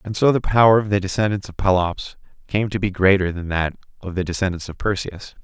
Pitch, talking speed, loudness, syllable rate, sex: 95 Hz, 220 wpm, -20 LUFS, 5.9 syllables/s, male